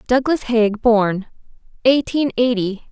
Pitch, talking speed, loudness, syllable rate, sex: 235 Hz, 105 wpm, -18 LUFS, 3.8 syllables/s, female